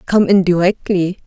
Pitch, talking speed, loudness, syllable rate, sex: 185 Hz, 140 wpm, -14 LUFS, 4.6 syllables/s, female